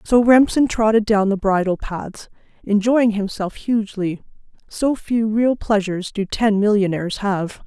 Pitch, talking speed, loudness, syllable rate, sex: 210 Hz, 140 wpm, -19 LUFS, 4.5 syllables/s, female